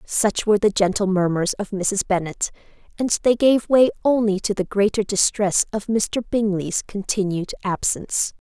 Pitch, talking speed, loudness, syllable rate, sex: 205 Hz, 155 wpm, -21 LUFS, 4.7 syllables/s, female